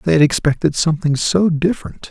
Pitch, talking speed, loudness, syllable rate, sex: 150 Hz, 170 wpm, -16 LUFS, 6.0 syllables/s, male